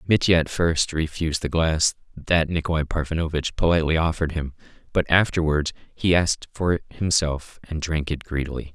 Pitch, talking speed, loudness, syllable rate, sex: 80 Hz, 160 wpm, -23 LUFS, 5.4 syllables/s, male